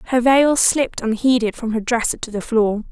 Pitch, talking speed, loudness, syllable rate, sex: 235 Hz, 205 wpm, -18 LUFS, 5.4 syllables/s, female